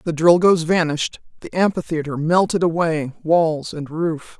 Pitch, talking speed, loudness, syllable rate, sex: 165 Hz, 135 wpm, -19 LUFS, 4.5 syllables/s, female